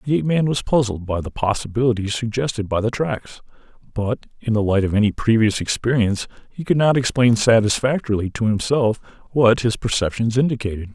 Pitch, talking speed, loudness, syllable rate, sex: 115 Hz, 170 wpm, -20 LUFS, 5.8 syllables/s, male